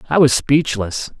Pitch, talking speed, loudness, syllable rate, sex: 130 Hz, 150 wpm, -16 LUFS, 4.1 syllables/s, male